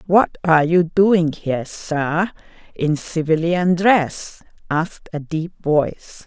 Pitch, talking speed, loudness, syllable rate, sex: 165 Hz, 125 wpm, -19 LUFS, 3.6 syllables/s, female